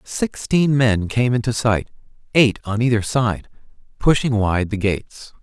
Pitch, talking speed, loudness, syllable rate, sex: 115 Hz, 145 wpm, -19 LUFS, 4.2 syllables/s, male